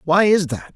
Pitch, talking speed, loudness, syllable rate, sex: 175 Hz, 240 wpm, -17 LUFS, 4.8 syllables/s, male